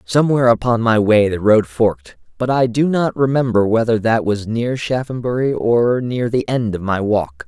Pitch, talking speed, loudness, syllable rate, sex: 115 Hz, 195 wpm, -16 LUFS, 4.9 syllables/s, male